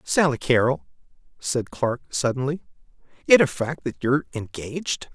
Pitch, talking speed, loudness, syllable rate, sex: 130 Hz, 130 wpm, -23 LUFS, 4.8 syllables/s, male